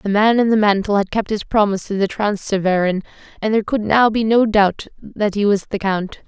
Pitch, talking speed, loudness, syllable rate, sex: 205 Hz, 230 wpm, -17 LUFS, 5.5 syllables/s, female